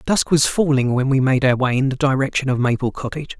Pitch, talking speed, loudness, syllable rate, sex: 135 Hz, 250 wpm, -18 LUFS, 6.1 syllables/s, male